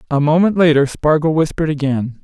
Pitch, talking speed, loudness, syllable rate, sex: 150 Hz, 160 wpm, -15 LUFS, 6.0 syllables/s, male